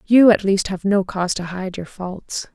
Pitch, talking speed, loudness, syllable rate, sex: 190 Hz, 235 wpm, -19 LUFS, 4.6 syllables/s, female